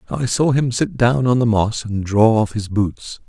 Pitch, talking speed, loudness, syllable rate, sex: 115 Hz, 240 wpm, -18 LUFS, 4.3 syllables/s, male